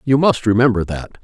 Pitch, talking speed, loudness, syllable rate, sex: 115 Hz, 195 wpm, -16 LUFS, 5.4 syllables/s, male